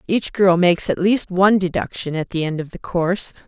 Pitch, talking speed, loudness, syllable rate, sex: 180 Hz, 225 wpm, -19 LUFS, 5.6 syllables/s, female